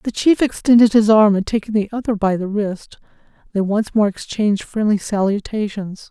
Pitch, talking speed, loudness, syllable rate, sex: 210 Hz, 175 wpm, -17 LUFS, 5.2 syllables/s, female